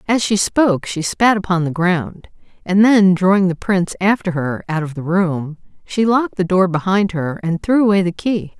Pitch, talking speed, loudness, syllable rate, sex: 185 Hz, 210 wpm, -16 LUFS, 5.0 syllables/s, female